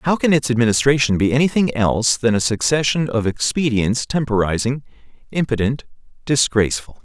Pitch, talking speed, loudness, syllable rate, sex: 125 Hz, 135 wpm, -18 LUFS, 5.5 syllables/s, male